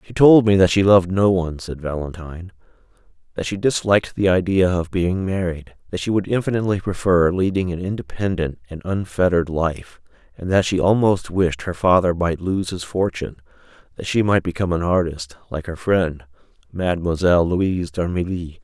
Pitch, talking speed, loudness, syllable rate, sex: 90 Hz, 165 wpm, -19 LUFS, 5.5 syllables/s, male